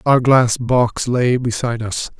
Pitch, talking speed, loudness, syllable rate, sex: 120 Hz, 165 wpm, -17 LUFS, 4.0 syllables/s, male